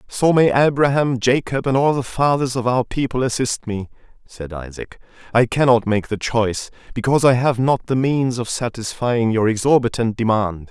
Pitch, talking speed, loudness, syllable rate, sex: 120 Hz, 175 wpm, -18 LUFS, 5.0 syllables/s, male